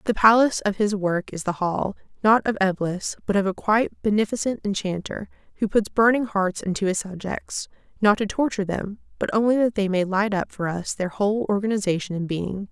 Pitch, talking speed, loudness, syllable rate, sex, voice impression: 200 Hz, 200 wpm, -23 LUFS, 5.5 syllables/s, female, very feminine, very adult-like, thin, very tensed, very powerful, slightly bright, slightly soft, very clear, fluent, raspy, cool, intellectual, refreshing, slightly sincere, calm, friendly, reassuring, unique, elegant, slightly wild, sweet, lively, very kind, modest